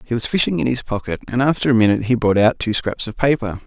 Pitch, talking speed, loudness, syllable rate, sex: 115 Hz, 280 wpm, -18 LUFS, 6.6 syllables/s, male